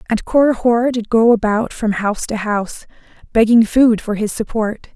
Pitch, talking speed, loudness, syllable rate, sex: 225 Hz, 170 wpm, -16 LUFS, 4.9 syllables/s, female